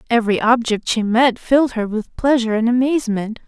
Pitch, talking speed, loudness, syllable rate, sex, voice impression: 235 Hz, 175 wpm, -17 LUFS, 5.9 syllables/s, female, feminine, adult-like, tensed, powerful, clear, raspy, intellectual, calm, friendly, reassuring, lively, slightly kind